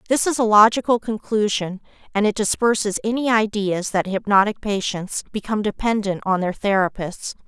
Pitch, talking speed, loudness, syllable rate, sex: 210 Hz, 145 wpm, -20 LUFS, 5.2 syllables/s, female